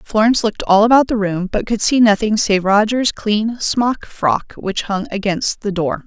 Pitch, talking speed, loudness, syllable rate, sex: 210 Hz, 200 wpm, -16 LUFS, 4.6 syllables/s, female